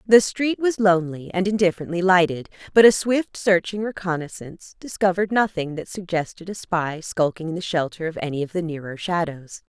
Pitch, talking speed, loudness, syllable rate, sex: 180 Hz, 170 wpm, -22 LUFS, 5.5 syllables/s, female